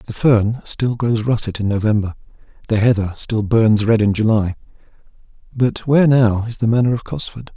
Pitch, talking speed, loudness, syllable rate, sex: 110 Hz, 175 wpm, -17 LUFS, 5.0 syllables/s, male